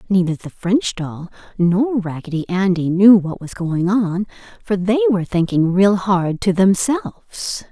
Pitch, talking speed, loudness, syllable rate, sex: 185 Hz, 155 wpm, -17 LUFS, 4.2 syllables/s, female